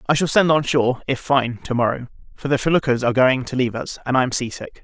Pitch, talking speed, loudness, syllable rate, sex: 130 Hz, 275 wpm, -19 LUFS, 6.5 syllables/s, male